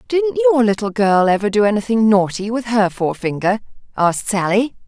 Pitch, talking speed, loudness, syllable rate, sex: 220 Hz, 160 wpm, -17 LUFS, 5.4 syllables/s, female